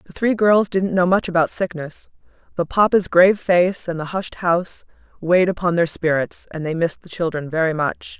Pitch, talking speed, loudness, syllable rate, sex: 175 Hz, 200 wpm, -19 LUFS, 5.3 syllables/s, female